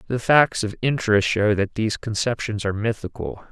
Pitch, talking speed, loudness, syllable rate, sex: 110 Hz, 170 wpm, -21 LUFS, 5.5 syllables/s, male